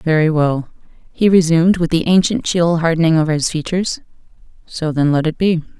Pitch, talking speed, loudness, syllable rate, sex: 165 Hz, 175 wpm, -15 LUFS, 5.7 syllables/s, female